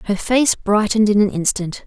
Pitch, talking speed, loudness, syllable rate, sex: 210 Hz, 195 wpm, -17 LUFS, 5.3 syllables/s, female